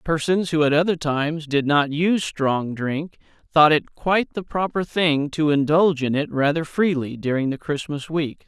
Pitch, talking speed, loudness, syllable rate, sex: 155 Hz, 185 wpm, -21 LUFS, 4.8 syllables/s, male